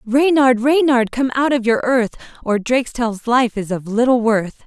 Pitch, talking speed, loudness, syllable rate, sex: 240 Hz, 180 wpm, -17 LUFS, 4.6 syllables/s, female